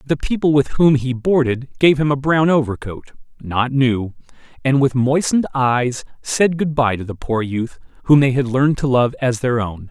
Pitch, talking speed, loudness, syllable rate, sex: 130 Hz, 200 wpm, -17 LUFS, 4.7 syllables/s, male